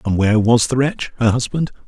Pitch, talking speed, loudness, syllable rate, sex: 115 Hz, 225 wpm, -17 LUFS, 5.9 syllables/s, male